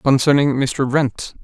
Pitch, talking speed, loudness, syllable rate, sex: 135 Hz, 125 wpm, -17 LUFS, 3.6 syllables/s, male